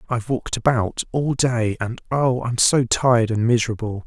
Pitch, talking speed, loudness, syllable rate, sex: 120 Hz, 150 wpm, -20 LUFS, 5.2 syllables/s, male